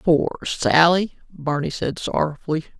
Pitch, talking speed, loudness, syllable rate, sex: 155 Hz, 105 wpm, -21 LUFS, 4.3 syllables/s, female